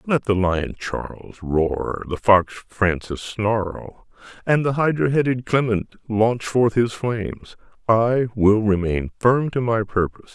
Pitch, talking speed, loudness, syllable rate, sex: 110 Hz, 145 wpm, -21 LUFS, 3.7 syllables/s, male